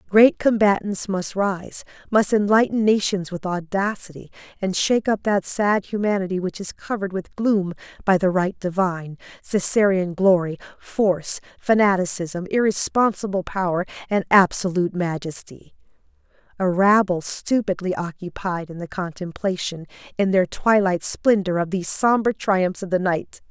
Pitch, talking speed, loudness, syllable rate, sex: 190 Hz, 130 wpm, -21 LUFS, 4.8 syllables/s, female